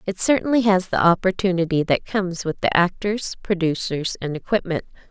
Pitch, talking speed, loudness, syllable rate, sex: 185 Hz, 155 wpm, -21 LUFS, 5.4 syllables/s, female